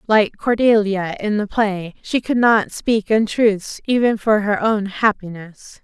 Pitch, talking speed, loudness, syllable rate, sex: 210 Hz, 155 wpm, -18 LUFS, 3.8 syllables/s, female